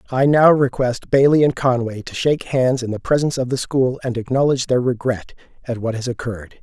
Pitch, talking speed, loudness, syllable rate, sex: 125 Hz, 210 wpm, -18 LUFS, 5.8 syllables/s, male